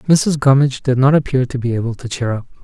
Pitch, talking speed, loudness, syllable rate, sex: 130 Hz, 250 wpm, -16 LUFS, 6.1 syllables/s, male